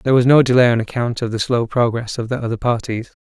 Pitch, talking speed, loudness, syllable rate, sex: 120 Hz, 260 wpm, -17 LUFS, 6.4 syllables/s, male